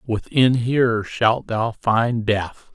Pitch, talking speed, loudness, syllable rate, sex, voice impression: 115 Hz, 130 wpm, -20 LUFS, 3.1 syllables/s, male, very masculine, very adult-like, slightly thick, cool, intellectual, slightly calm, slightly elegant